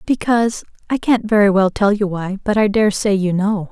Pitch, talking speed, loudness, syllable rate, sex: 205 Hz, 225 wpm, -16 LUFS, 5.1 syllables/s, female